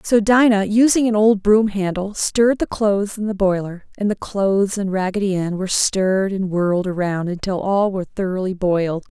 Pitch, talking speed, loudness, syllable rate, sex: 200 Hz, 190 wpm, -18 LUFS, 5.3 syllables/s, female